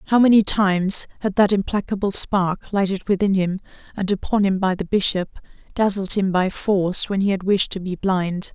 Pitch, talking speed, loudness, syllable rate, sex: 195 Hz, 190 wpm, -20 LUFS, 5.2 syllables/s, female